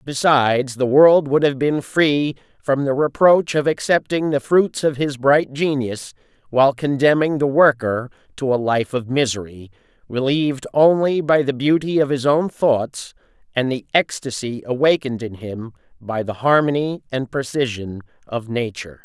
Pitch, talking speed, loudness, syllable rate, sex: 135 Hz, 155 wpm, -18 LUFS, 4.6 syllables/s, male